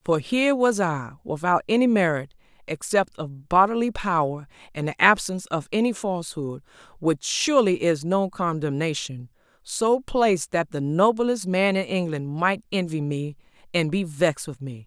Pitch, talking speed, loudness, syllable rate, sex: 175 Hz, 155 wpm, -23 LUFS, 4.2 syllables/s, female